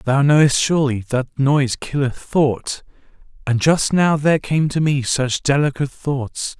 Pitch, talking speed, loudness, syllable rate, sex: 140 Hz, 145 wpm, -18 LUFS, 4.5 syllables/s, male